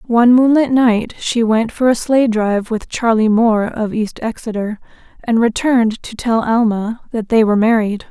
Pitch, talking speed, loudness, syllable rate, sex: 225 Hz, 170 wpm, -15 LUFS, 4.9 syllables/s, female